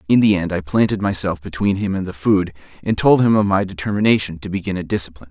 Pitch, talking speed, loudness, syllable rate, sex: 95 Hz, 240 wpm, -18 LUFS, 6.6 syllables/s, male